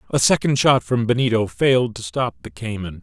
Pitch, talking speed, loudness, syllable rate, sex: 115 Hz, 200 wpm, -19 LUFS, 5.5 syllables/s, male